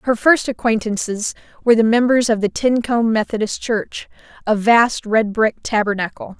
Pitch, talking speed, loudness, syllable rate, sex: 225 Hz, 150 wpm, -17 LUFS, 4.8 syllables/s, female